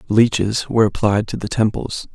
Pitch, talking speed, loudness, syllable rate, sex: 110 Hz, 170 wpm, -18 LUFS, 5.2 syllables/s, male